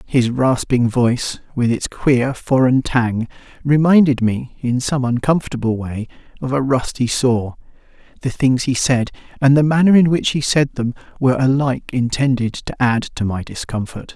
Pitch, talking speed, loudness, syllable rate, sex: 130 Hz, 155 wpm, -17 LUFS, 4.7 syllables/s, male